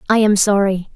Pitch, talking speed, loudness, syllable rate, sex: 200 Hz, 190 wpm, -15 LUFS, 5.3 syllables/s, female